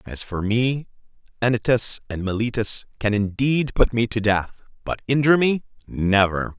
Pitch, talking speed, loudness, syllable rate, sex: 115 Hz, 145 wpm, -22 LUFS, 4.6 syllables/s, male